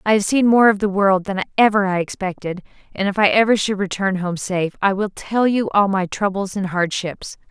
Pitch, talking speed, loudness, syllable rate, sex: 195 Hz, 225 wpm, -18 LUFS, 5.3 syllables/s, female